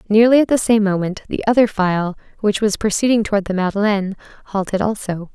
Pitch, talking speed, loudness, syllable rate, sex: 205 Hz, 180 wpm, -18 LUFS, 6.1 syllables/s, female